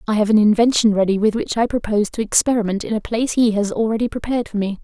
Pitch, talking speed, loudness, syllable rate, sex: 215 Hz, 250 wpm, -18 LUFS, 7.1 syllables/s, female